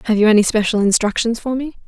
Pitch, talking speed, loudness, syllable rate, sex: 225 Hz, 225 wpm, -16 LUFS, 6.9 syllables/s, female